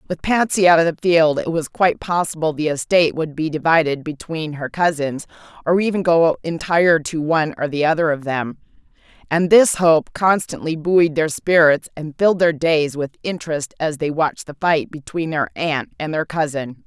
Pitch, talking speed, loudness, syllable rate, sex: 160 Hz, 190 wpm, -18 LUFS, 5.1 syllables/s, female